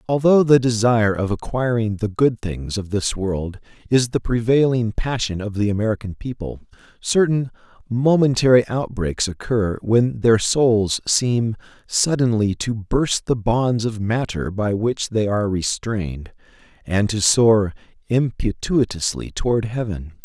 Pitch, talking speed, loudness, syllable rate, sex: 110 Hz, 135 wpm, -20 LUFS, 4.3 syllables/s, male